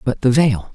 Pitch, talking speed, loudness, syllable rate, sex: 130 Hz, 240 wpm, -16 LUFS, 4.8 syllables/s, male